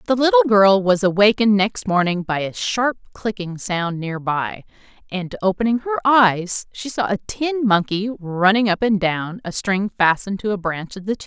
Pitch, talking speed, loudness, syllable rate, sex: 205 Hz, 190 wpm, -19 LUFS, 4.6 syllables/s, female